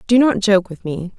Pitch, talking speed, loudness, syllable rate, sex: 200 Hz, 255 wpm, -17 LUFS, 4.9 syllables/s, female